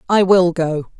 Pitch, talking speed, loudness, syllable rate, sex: 175 Hz, 180 wpm, -15 LUFS, 4.0 syllables/s, female